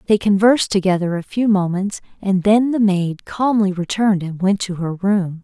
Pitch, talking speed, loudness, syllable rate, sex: 195 Hz, 190 wpm, -18 LUFS, 4.9 syllables/s, female